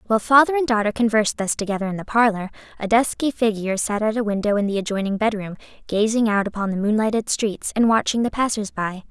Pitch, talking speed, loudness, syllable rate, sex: 215 Hz, 210 wpm, -21 LUFS, 6.4 syllables/s, female